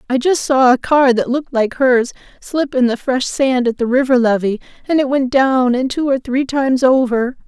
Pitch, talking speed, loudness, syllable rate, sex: 255 Hz, 225 wpm, -15 LUFS, 4.9 syllables/s, female